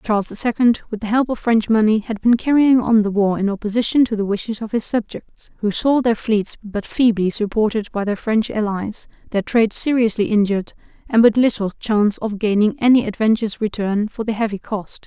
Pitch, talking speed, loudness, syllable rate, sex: 220 Hz, 205 wpm, -18 LUFS, 5.6 syllables/s, female